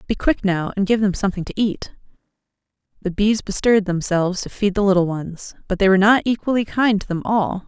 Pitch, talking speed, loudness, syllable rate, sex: 200 Hz, 210 wpm, -19 LUFS, 6.1 syllables/s, female